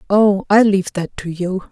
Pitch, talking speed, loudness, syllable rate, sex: 195 Hz, 210 wpm, -16 LUFS, 4.9 syllables/s, female